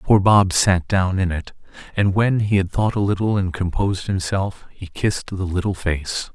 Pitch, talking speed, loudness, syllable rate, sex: 95 Hz, 200 wpm, -20 LUFS, 4.7 syllables/s, male